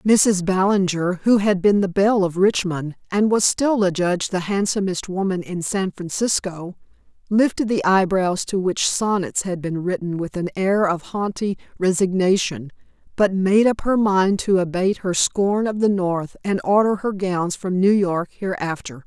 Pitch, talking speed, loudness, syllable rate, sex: 190 Hz, 170 wpm, -20 LUFS, 4.5 syllables/s, female